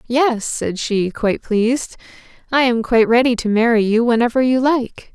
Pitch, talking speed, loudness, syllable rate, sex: 235 Hz, 175 wpm, -17 LUFS, 4.9 syllables/s, female